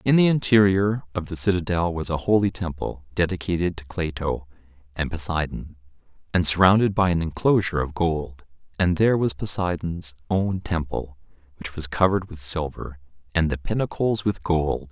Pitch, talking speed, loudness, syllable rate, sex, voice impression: 85 Hz, 155 wpm, -23 LUFS, 5.2 syllables/s, male, masculine, adult-like, thick, tensed, powerful, slightly dark, slightly raspy, cool, intellectual, mature, wild, kind, slightly modest